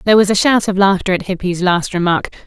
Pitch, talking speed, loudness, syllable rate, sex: 190 Hz, 245 wpm, -15 LUFS, 6.4 syllables/s, female